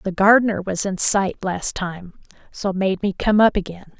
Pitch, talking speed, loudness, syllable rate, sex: 195 Hz, 195 wpm, -19 LUFS, 4.6 syllables/s, female